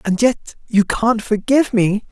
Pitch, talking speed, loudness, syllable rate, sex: 220 Hz, 170 wpm, -17 LUFS, 4.2 syllables/s, male